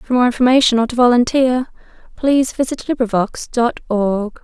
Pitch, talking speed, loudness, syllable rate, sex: 245 Hz, 150 wpm, -16 LUFS, 5.2 syllables/s, female